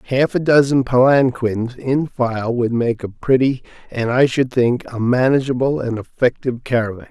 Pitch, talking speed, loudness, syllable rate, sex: 125 Hz, 160 wpm, -17 LUFS, 4.7 syllables/s, male